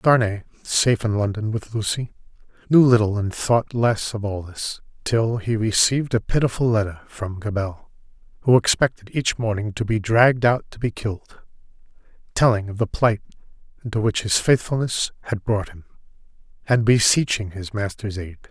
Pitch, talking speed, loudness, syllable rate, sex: 110 Hz, 160 wpm, -21 LUFS, 5.1 syllables/s, male